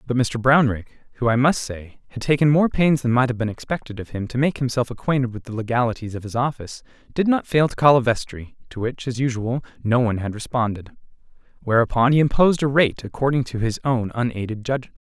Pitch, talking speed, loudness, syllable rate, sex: 125 Hz, 215 wpm, -21 LUFS, 6.1 syllables/s, male